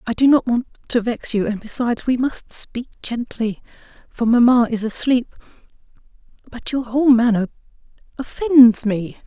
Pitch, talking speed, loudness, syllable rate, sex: 240 Hz, 150 wpm, -18 LUFS, 4.8 syllables/s, female